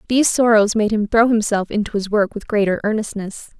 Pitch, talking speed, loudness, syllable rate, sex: 215 Hz, 200 wpm, -18 LUFS, 5.8 syllables/s, female